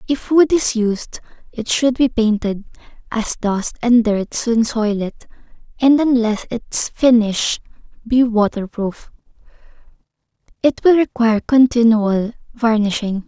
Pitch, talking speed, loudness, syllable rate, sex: 230 Hz, 120 wpm, -17 LUFS, 3.9 syllables/s, female